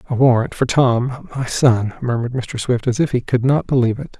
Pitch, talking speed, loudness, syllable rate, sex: 125 Hz, 215 wpm, -18 LUFS, 5.5 syllables/s, male